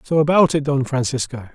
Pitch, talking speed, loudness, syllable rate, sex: 140 Hz, 195 wpm, -18 LUFS, 5.8 syllables/s, male